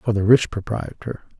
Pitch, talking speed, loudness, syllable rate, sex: 110 Hz, 175 wpm, -20 LUFS, 4.8 syllables/s, male